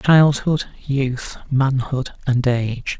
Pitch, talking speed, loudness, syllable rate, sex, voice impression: 135 Hz, 100 wpm, -20 LUFS, 3.0 syllables/s, male, masculine, adult-like, relaxed, weak, dark, muffled, raspy, sincere, calm, unique, kind, modest